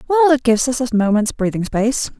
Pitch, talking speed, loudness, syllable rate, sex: 245 Hz, 220 wpm, -17 LUFS, 6.2 syllables/s, female